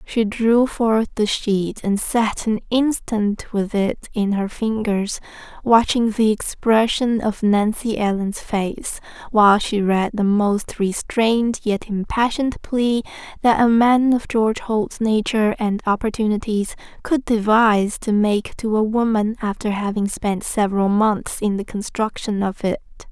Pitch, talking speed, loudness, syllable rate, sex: 215 Hz, 145 wpm, -19 LUFS, 4.1 syllables/s, female